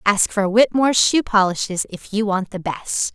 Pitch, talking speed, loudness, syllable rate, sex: 210 Hz, 190 wpm, -19 LUFS, 5.0 syllables/s, female